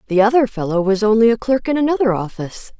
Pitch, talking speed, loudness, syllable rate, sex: 220 Hz, 215 wpm, -16 LUFS, 6.6 syllables/s, female